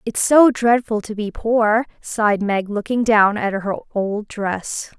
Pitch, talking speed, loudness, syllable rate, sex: 215 Hz, 170 wpm, -18 LUFS, 3.8 syllables/s, female